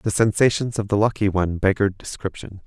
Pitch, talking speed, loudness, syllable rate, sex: 100 Hz, 180 wpm, -21 LUFS, 6.1 syllables/s, male